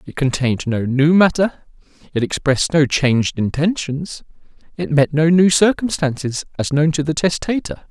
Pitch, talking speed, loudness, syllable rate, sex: 150 Hz, 150 wpm, -17 LUFS, 4.9 syllables/s, male